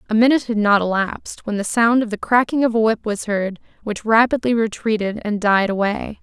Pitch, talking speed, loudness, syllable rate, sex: 220 Hz, 210 wpm, -18 LUFS, 5.5 syllables/s, female